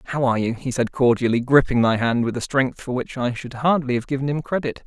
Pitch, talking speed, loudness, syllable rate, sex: 130 Hz, 260 wpm, -21 LUFS, 6.1 syllables/s, male